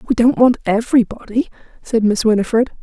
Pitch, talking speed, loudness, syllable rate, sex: 230 Hz, 150 wpm, -16 LUFS, 6.1 syllables/s, female